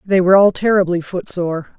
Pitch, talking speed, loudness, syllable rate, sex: 185 Hz, 170 wpm, -15 LUFS, 6.3 syllables/s, female